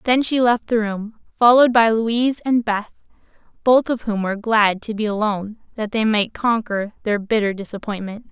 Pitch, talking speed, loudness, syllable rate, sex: 220 Hz, 180 wpm, -19 LUFS, 5.1 syllables/s, female